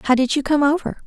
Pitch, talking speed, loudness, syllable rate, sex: 280 Hz, 280 wpm, -18 LUFS, 7.1 syllables/s, female